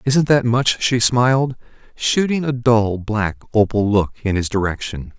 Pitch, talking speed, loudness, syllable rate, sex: 115 Hz, 160 wpm, -18 LUFS, 4.3 syllables/s, male